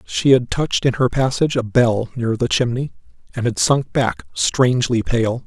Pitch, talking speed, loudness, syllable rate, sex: 125 Hz, 185 wpm, -18 LUFS, 4.8 syllables/s, male